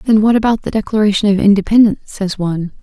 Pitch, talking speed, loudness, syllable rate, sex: 205 Hz, 190 wpm, -14 LUFS, 7.0 syllables/s, female